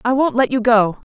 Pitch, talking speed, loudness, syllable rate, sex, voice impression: 240 Hz, 270 wpm, -16 LUFS, 5.4 syllables/s, female, feminine, adult-like, clear, fluent, intellectual, calm, slightly friendly, slightly reassuring, elegant, slightly strict